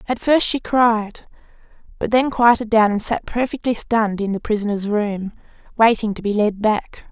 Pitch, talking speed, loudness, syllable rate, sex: 220 Hz, 175 wpm, -19 LUFS, 4.8 syllables/s, female